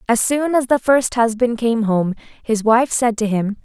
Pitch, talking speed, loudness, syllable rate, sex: 235 Hz, 215 wpm, -17 LUFS, 4.4 syllables/s, female